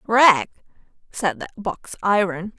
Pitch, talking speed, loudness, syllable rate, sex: 205 Hz, 115 wpm, -20 LUFS, 3.6 syllables/s, female